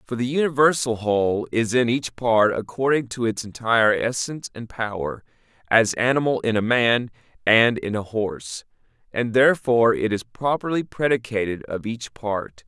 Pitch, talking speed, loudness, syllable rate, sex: 115 Hz, 155 wpm, -21 LUFS, 4.9 syllables/s, male